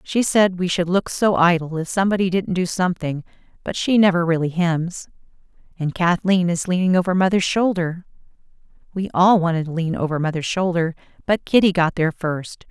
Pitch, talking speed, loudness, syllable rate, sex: 175 Hz, 175 wpm, -19 LUFS, 5.4 syllables/s, female